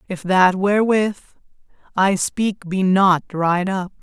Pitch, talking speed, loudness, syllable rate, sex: 190 Hz, 135 wpm, -18 LUFS, 3.6 syllables/s, female